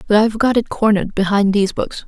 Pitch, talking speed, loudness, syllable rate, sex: 210 Hz, 230 wpm, -16 LUFS, 6.8 syllables/s, female